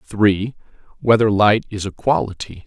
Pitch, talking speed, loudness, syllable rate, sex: 100 Hz, 135 wpm, -18 LUFS, 5.4 syllables/s, male